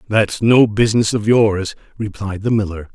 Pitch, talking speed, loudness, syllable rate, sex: 105 Hz, 165 wpm, -16 LUFS, 4.7 syllables/s, male